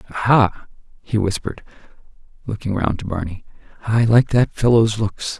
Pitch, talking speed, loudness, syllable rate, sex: 105 Hz, 135 wpm, -19 LUFS, 4.9 syllables/s, male